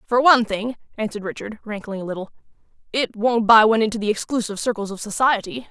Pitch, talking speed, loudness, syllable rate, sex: 220 Hz, 190 wpm, -20 LUFS, 6.8 syllables/s, female